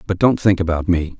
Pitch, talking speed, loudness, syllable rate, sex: 90 Hz, 250 wpm, -17 LUFS, 5.7 syllables/s, male